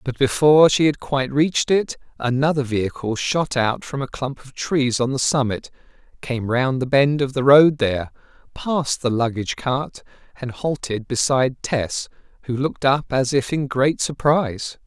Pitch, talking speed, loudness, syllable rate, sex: 135 Hz, 175 wpm, -20 LUFS, 4.9 syllables/s, male